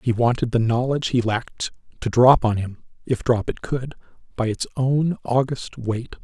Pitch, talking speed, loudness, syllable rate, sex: 120 Hz, 185 wpm, -22 LUFS, 4.8 syllables/s, male